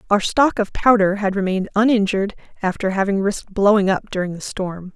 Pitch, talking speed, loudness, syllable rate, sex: 200 Hz, 180 wpm, -19 LUFS, 5.9 syllables/s, female